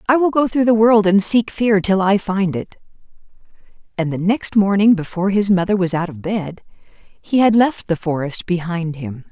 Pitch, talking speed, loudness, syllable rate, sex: 195 Hz, 200 wpm, -17 LUFS, 4.7 syllables/s, female